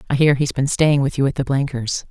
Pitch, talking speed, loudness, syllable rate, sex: 140 Hz, 285 wpm, -18 LUFS, 5.8 syllables/s, female